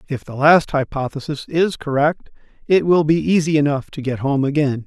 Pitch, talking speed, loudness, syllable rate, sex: 145 Hz, 185 wpm, -18 LUFS, 5.1 syllables/s, male